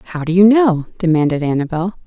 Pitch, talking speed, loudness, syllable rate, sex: 175 Hz, 175 wpm, -15 LUFS, 6.3 syllables/s, female